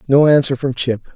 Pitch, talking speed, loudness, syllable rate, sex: 135 Hz, 210 wpm, -15 LUFS, 5.8 syllables/s, male